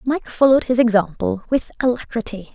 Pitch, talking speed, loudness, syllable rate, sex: 235 Hz, 140 wpm, -19 LUFS, 5.7 syllables/s, female